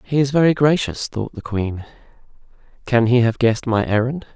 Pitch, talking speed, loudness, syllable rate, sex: 125 Hz, 180 wpm, -19 LUFS, 5.4 syllables/s, male